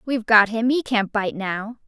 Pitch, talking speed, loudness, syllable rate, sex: 220 Hz, 225 wpm, -20 LUFS, 4.7 syllables/s, female